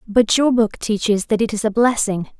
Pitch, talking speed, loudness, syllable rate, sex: 215 Hz, 225 wpm, -18 LUFS, 5.1 syllables/s, female